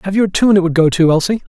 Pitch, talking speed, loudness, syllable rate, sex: 185 Hz, 350 wpm, -13 LUFS, 7.5 syllables/s, male